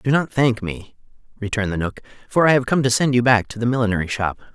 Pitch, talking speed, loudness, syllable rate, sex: 115 Hz, 250 wpm, -19 LUFS, 6.4 syllables/s, male